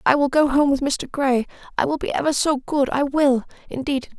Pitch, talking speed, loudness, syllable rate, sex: 275 Hz, 230 wpm, -21 LUFS, 5.3 syllables/s, female